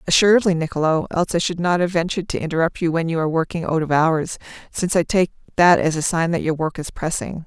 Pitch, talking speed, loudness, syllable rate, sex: 165 Hz, 240 wpm, -20 LUFS, 6.6 syllables/s, female